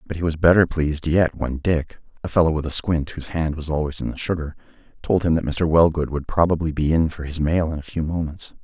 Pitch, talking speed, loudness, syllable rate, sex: 80 Hz, 235 wpm, -21 LUFS, 5.9 syllables/s, male